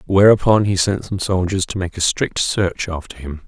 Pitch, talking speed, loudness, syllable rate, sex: 95 Hz, 205 wpm, -18 LUFS, 4.8 syllables/s, male